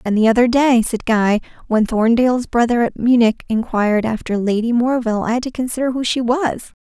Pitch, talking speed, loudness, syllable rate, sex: 235 Hz, 195 wpm, -17 LUFS, 5.6 syllables/s, female